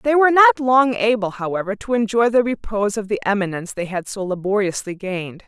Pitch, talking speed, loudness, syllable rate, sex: 215 Hz, 195 wpm, -19 LUFS, 6.0 syllables/s, female